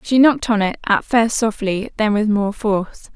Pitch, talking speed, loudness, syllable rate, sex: 215 Hz, 210 wpm, -18 LUFS, 4.8 syllables/s, female